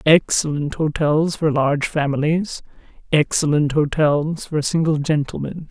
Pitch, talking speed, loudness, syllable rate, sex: 150 Hz, 105 wpm, -19 LUFS, 4.3 syllables/s, female